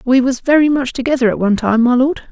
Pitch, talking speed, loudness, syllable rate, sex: 255 Hz, 260 wpm, -14 LUFS, 6.3 syllables/s, female